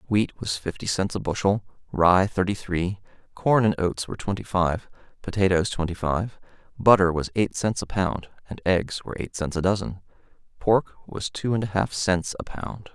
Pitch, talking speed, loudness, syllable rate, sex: 95 Hz, 185 wpm, -25 LUFS, 4.9 syllables/s, male